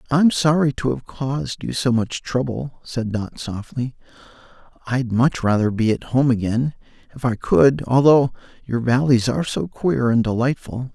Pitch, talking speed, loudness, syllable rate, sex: 125 Hz, 165 wpm, -20 LUFS, 4.5 syllables/s, male